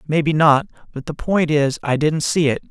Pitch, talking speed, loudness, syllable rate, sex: 150 Hz, 220 wpm, -18 LUFS, 5.0 syllables/s, male